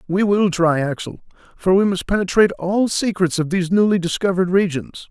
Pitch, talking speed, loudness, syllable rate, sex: 185 Hz, 175 wpm, -18 LUFS, 5.6 syllables/s, male